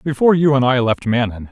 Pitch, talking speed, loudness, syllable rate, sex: 130 Hz, 240 wpm, -16 LUFS, 6.1 syllables/s, male